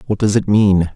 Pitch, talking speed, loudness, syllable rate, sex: 100 Hz, 250 wpm, -14 LUFS, 5.1 syllables/s, male